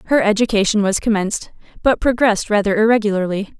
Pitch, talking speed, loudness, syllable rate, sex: 210 Hz, 135 wpm, -17 LUFS, 6.5 syllables/s, female